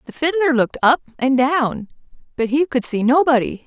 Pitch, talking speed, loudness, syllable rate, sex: 270 Hz, 180 wpm, -18 LUFS, 5.3 syllables/s, female